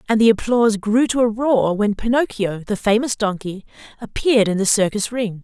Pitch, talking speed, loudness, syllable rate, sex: 220 Hz, 190 wpm, -18 LUFS, 5.4 syllables/s, female